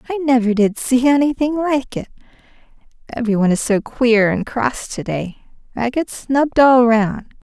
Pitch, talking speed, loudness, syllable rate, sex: 240 Hz, 175 wpm, -17 LUFS, 4.8 syllables/s, female